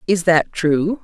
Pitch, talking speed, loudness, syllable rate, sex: 175 Hz, 175 wpm, -17 LUFS, 3.5 syllables/s, female